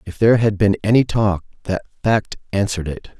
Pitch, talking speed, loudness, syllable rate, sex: 105 Hz, 190 wpm, -19 LUFS, 5.7 syllables/s, male